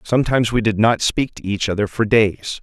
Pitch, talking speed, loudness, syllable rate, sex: 110 Hz, 230 wpm, -18 LUFS, 5.5 syllables/s, male